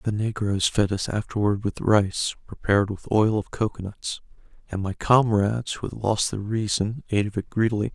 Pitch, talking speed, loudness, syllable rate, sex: 105 Hz, 180 wpm, -24 LUFS, 5.2 syllables/s, male